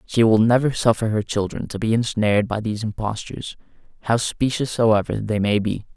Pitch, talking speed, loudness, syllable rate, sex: 110 Hz, 180 wpm, -21 LUFS, 5.5 syllables/s, male